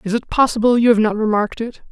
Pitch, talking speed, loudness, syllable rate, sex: 225 Hz, 250 wpm, -16 LUFS, 6.8 syllables/s, female